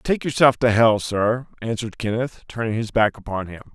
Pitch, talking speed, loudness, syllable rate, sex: 115 Hz, 190 wpm, -21 LUFS, 5.3 syllables/s, male